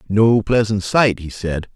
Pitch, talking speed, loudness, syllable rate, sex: 105 Hz, 170 wpm, -17 LUFS, 3.9 syllables/s, male